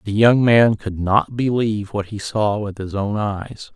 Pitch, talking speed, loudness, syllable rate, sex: 105 Hz, 210 wpm, -19 LUFS, 4.1 syllables/s, male